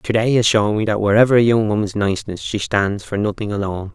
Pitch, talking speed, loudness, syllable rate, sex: 105 Hz, 245 wpm, -18 LUFS, 6.1 syllables/s, male